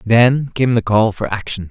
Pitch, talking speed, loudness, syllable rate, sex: 110 Hz, 210 wpm, -16 LUFS, 4.4 syllables/s, male